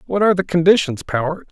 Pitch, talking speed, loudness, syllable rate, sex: 175 Hz, 200 wpm, -17 LUFS, 6.6 syllables/s, male